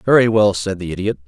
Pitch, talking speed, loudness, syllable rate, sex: 100 Hz, 235 wpm, -17 LUFS, 6.5 syllables/s, male